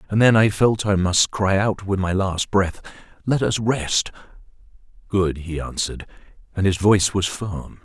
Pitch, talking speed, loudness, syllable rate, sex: 100 Hz, 175 wpm, -20 LUFS, 4.5 syllables/s, male